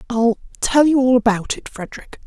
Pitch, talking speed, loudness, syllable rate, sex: 240 Hz, 185 wpm, -17 LUFS, 5.5 syllables/s, female